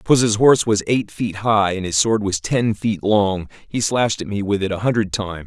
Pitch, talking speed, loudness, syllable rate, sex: 105 Hz, 250 wpm, -19 LUFS, 5.5 syllables/s, male